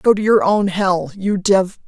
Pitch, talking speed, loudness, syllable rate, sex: 195 Hz, 225 wpm, -16 LUFS, 4.1 syllables/s, female